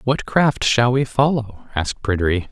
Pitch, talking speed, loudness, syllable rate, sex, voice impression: 115 Hz, 165 wpm, -19 LUFS, 4.7 syllables/s, male, masculine, middle-aged, tensed, powerful, hard, raspy, sincere, calm, mature, wild, strict